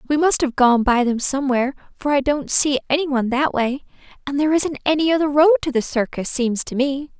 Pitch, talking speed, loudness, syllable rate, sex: 275 Hz, 225 wpm, -19 LUFS, 6.0 syllables/s, female